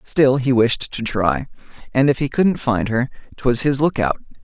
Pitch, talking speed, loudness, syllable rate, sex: 125 Hz, 205 wpm, -19 LUFS, 4.5 syllables/s, male